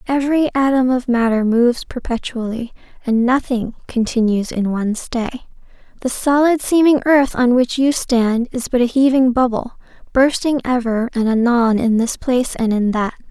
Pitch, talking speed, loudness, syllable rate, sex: 245 Hz, 160 wpm, -17 LUFS, 4.9 syllables/s, female